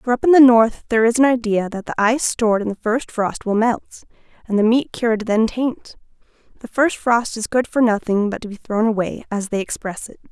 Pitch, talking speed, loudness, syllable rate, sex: 225 Hz, 240 wpm, -18 LUFS, 5.7 syllables/s, female